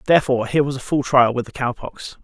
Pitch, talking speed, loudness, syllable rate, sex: 130 Hz, 270 wpm, -19 LUFS, 6.8 syllables/s, male